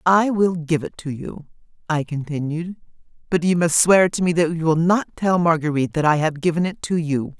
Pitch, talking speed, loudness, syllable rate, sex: 165 Hz, 220 wpm, -20 LUFS, 5.3 syllables/s, female